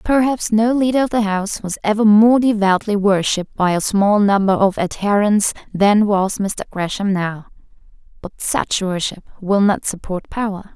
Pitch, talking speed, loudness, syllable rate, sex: 205 Hz, 160 wpm, -17 LUFS, 4.7 syllables/s, female